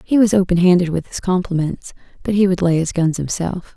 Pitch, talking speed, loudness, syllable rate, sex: 180 Hz, 225 wpm, -17 LUFS, 5.7 syllables/s, female